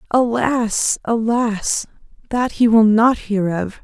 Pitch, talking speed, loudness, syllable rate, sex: 225 Hz, 125 wpm, -17 LUFS, 3.2 syllables/s, female